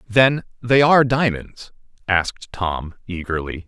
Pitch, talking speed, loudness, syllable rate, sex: 110 Hz, 115 wpm, -19 LUFS, 4.2 syllables/s, male